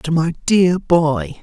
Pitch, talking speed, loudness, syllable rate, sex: 160 Hz, 170 wpm, -16 LUFS, 2.9 syllables/s, male